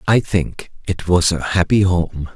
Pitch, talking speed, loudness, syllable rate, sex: 90 Hz, 180 wpm, -17 LUFS, 3.9 syllables/s, male